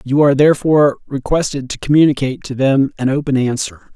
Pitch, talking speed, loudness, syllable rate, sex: 140 Hz, 165 wpm, -15 LUFS, 6.4 syllables/s, male